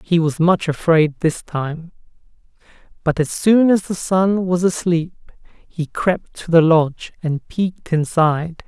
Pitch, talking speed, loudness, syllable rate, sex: 165 Hz, 150 wpm, -18 LUFS, 3.9 syllables/s, male